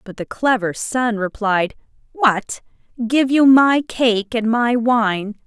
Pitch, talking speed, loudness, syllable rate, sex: 230 Hz, 145 wpm, -17 LUFS, 3.4 syllables/s, female